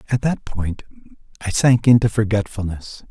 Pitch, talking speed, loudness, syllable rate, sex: 110 Hz, 135 wpm, -19 LUFS, 4.9 syllables/s, male